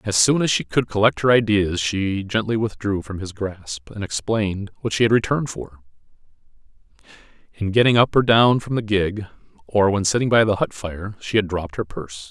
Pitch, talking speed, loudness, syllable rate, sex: 100 Hz, 200 wpm, -20 LUFS, 5.3 syllables/s, male